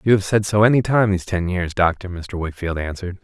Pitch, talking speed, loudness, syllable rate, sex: 95 Hz, 240 wpm, -19 LUFS, 6.1 syllables/s, male